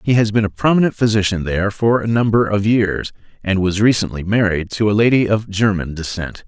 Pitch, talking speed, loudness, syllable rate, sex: 105 Hz, 205 wpm, -17 LUFS, 5.6 syllables/s, male